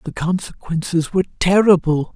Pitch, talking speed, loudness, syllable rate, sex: 175 Hz, 110 wpm, -18 LUFS, 5.4 syllables/s, male